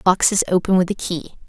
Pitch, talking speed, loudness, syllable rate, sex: 180 Hz, 205 wpm, -19 LUFS, 5.2 syllables/s, female